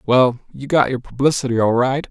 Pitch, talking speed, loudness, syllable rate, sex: 130 Hz, 200 wpm, -18 LUFS, 5.3 syllables/s, male